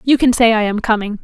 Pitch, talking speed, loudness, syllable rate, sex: 225 Hz, 290 wpm, -14 LUFS, 6.2 syllables/s, female